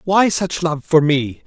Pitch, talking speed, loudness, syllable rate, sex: 165 Hz, 205 wpm, -17 LUFS, 3.8 syllables/s, male